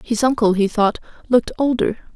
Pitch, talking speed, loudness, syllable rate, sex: 225 Hz, 165 wpm, -18 LUFS, 5.5 syllables/s, female